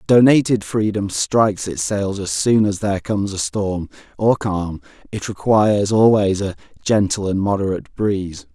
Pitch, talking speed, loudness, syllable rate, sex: 100 Hz, 140 wpm, -18 LUFS, 4.8 syllables/s, male